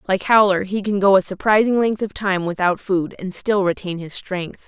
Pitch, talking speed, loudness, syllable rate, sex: 195 Hz, 220 wpm, -19 LUFS, 4.9 syllables/s, female